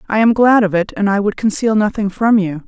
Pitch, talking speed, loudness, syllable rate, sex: 210 Hz, 270 wpm, -14 LUFS, 5.7 syllables/s, female